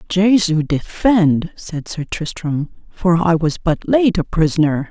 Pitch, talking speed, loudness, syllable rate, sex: 170 Hz, 145 wpm, -17 LUFS, 3.9 syllables/s, female